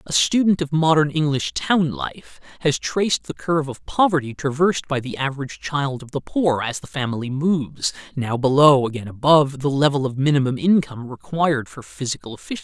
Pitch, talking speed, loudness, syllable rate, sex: 145 Hz, 180 wpm, -20 LUFS, 5.7 syllables/s, male